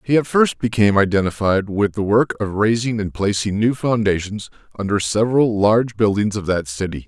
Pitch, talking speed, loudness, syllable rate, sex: 105 Hz, 180 wpm, -18 LUFS, 5.4 syllables/s, male